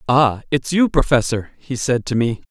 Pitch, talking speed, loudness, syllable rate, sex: 130 Hz, 190 wpm, -18 LUFS, 4.7 syllables/s, male